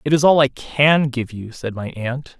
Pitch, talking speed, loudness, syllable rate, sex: 130 Hz, 250 wpm, -18 LUFS, 4.4 syllables/s, male